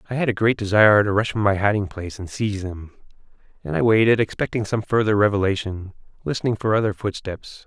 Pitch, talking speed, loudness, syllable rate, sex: 105 Hz, 195 wpm, -21 LUFS, 6.4 syllables/s, male